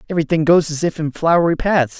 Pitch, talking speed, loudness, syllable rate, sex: 160 Hz, 210 wpm, -16 LUFS, 6.5 syllables/s, male